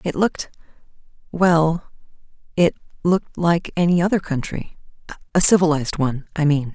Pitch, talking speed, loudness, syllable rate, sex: 165 Hz, 105 wpm, -19 LUFS, 5.4 syllables/s, female